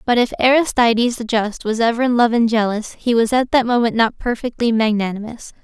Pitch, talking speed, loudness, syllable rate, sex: 230 Hz, 200 wpm, -17 LUFS, 5.6 syllables/s, female